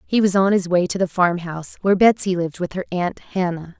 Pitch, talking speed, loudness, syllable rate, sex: 180 Hz, 235 wpm, -20 LUFS, 5.9 syllables/s, female